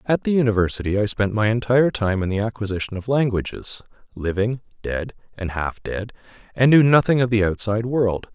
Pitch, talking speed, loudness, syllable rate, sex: 110 Hz, 180 wpm, -21 LUFS, 5.6 syllables/s, male